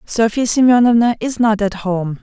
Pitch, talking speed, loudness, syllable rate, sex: 220 Hz, 160 wpm, -15 LUFS, 4.8 syllables/s, female